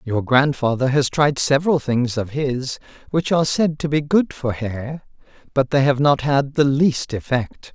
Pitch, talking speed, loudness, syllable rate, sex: 135 Hz, 185 wpm, -19 LUFS, 4.4 syllables/s, male